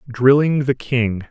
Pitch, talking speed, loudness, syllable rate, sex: 130 Hz, 140 wpm, -17 LUFS, 4.0 syllables/s, male